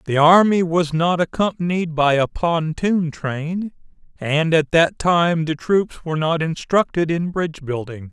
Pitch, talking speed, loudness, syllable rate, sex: 165 Hz, 155 wpm, -19 LUFS, 4.1 syllables/s, male